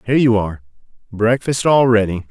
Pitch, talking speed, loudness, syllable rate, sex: 110 Hz, 155 wpm, -16 LUFS, 5.9 syllables/s, male